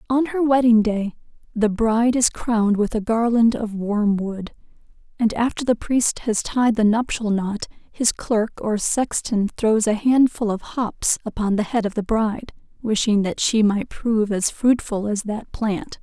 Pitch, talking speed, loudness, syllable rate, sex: 220 Hz, 175 wpm, -20 LUFS, 4.4 syllables/s, female